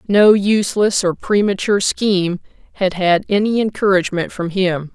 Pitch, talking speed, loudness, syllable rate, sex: 195 Hz, 135 wpm, -16 LUFS, 5.1 syllables/s, female